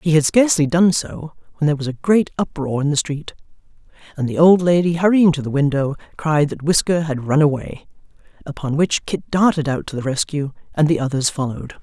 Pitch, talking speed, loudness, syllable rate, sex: 155 Hz, 205 wpm, -18 LUFS, 5.7 syllables/s, female